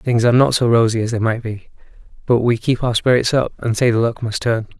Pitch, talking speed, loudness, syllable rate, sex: 115 Hz, 265 wpm, -17 LUFS, 5.9 syllables/s, male